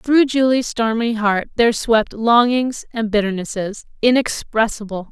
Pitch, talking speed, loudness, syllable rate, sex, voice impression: 225 Hz, 115 wpm, -18 LUFS, 4.4 syllables/s, female, feminine, adult-like, tensed, powerful, clear, fluent, intellectual, friendly, lively, intense, sharp